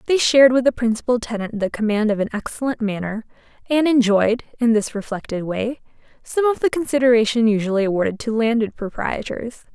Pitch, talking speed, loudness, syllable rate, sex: 230 Hz, 165 wpm, -19 LUFS, 5.8 syllables/s, female